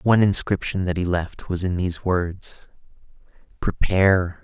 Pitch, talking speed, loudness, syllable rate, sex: 90 Hz, 135 wpm, -22 LUFS, 4.6 syllables/s, male